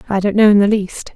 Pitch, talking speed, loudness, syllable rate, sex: 205 Hz, 315 wpm, -13 LUFS, 6.3 syllables/s, female